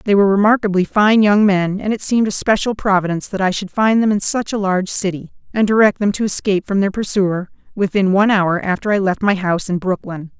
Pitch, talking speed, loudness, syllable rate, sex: 200 Hz, 230 wpm, -16 LUFS, 6.1 syllables/s, female